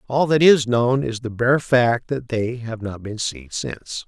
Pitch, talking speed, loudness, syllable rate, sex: 120 Hz, 220 wpm, -20 LUFS, 4.2 syllables/s, male